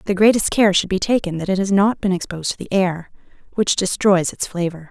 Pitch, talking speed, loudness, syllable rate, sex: 190 Hz, 235 wpm, -18 LUFS, 5.8 syllables/s, female